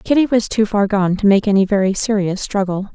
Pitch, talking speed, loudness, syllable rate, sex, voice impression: 205 Hz, 225 wpm, -16 LUFS, 5.7 syllables/s, female, feminine, tensed, slightly powerful, slightly hard, clear, fluent, intellectual, calm, elegant, sharp